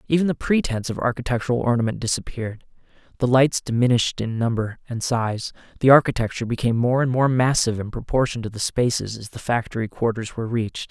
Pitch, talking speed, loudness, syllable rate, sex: 120 Hz, 175 wpm, -22 LUFS, 6.5 syllables/s, male